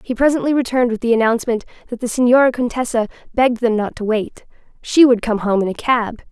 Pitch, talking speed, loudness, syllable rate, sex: 235 Hz, 200 wpm, -17 LUFS, 6.5 syllables/s, female